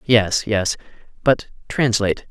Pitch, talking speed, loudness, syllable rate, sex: 110 Hz, 80 wpm, -20 LUFS, 3.8 syllables/s, male